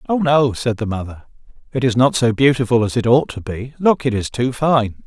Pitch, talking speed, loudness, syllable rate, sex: 125 Hz, 235 wpm, -17 LUFS, 5.3 syllables/s, male